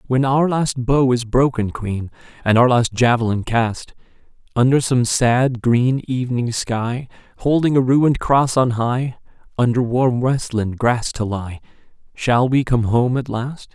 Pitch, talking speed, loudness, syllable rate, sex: 125 Hz, 155 wpm, -18 LUFS, 4.1 syllables/s, male